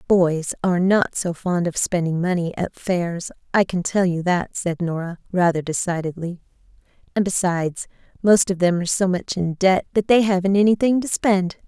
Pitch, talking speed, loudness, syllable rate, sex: 180 Hz, 180 wpm, -20 LUFS, 5.0 syllables/s, female